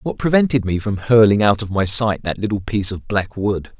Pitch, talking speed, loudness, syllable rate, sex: 105 Hz, 235 wpm, -18 LUFS, 5.4 syllables/s, male